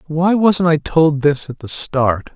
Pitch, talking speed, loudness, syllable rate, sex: 155 Hz, 205 wpm, -16 LUFS, 3.7 syllables/s, male